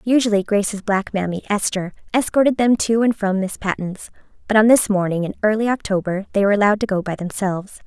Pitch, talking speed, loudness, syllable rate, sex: 205 Hz, 200 wpm, -19 LUFS, 6.2 syllables/s, female